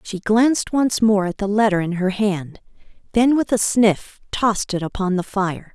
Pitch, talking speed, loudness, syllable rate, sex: 205 Hz, 200 wpm, -19 LUFS, 4.6 syllables/s, female